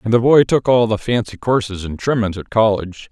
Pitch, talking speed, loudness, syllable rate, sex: 110 Hz, 230 wpm, -17 LUFS, 5.7 syllables/s, male